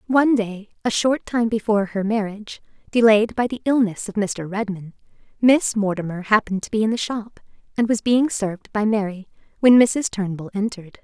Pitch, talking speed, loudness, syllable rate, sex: 215 Hz, 180 wpm, -20 LUFS, 5.4 syllables/s, female